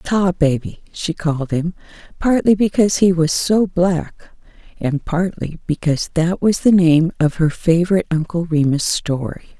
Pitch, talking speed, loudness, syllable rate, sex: 170 Hz, 145 wpm, -17 LUFS, 4.7 syllables/s, female